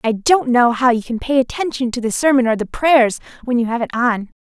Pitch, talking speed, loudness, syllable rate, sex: 245 Hz, 255 wpm, -16 LUFS, 5.5 syllables/s, female